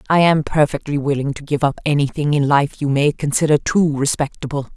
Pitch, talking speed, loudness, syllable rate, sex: 145 Hz, 190 wpm, -18 LUFS, 5.6 syllables/s, female